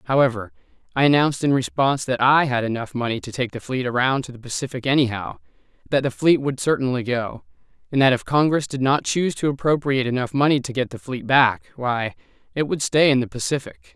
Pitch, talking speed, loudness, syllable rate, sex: 130 Hz, 205 wpm, -21 LUFS, 6.2 syllables/s, male